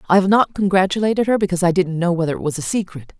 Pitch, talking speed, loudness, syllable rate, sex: 185 Hz, 265 wpm, -18 LUFS, 7.4 syllables/s, female